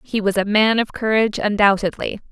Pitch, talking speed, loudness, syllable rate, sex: 210 Hz, 180 wpm, -18 LUFS, 5.7 syllables/s, female